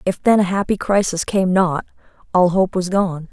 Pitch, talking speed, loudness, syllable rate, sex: 185 Hz, 200 wpm, -18 LUFS, 4.8 syllables/s, female